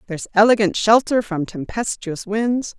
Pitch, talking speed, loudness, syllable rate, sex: 205 Hz, 130 wpm, -19 LUFS, 4.7 syllables/s, female